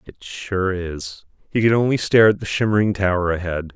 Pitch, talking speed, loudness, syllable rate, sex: 100 Hz, 190 wpm, -19 LUFS, 5.4 syllables/s, male